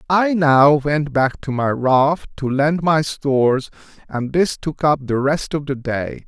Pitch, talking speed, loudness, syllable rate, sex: 145 Hz, 190 wpm, -18 LUFS, 3.7 syllables/s, male